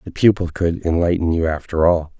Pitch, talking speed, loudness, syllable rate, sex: 85 Hz, 190 wpm, -18 LUFS, 5.4 syllables/s, male